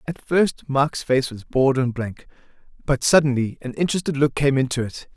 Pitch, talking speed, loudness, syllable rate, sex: 135 Hz, 185 wpm, -21 LUFS, 5.7 syllables/s, male